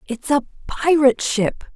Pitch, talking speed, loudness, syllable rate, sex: 275 Hz, 135 wpm, -19 LUFS, 4.6 syllables/s, female